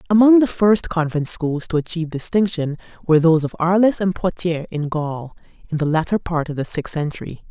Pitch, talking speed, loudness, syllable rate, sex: 170 Hz, 190 wpm, -19 LUFS, 5.4 syllables/s, female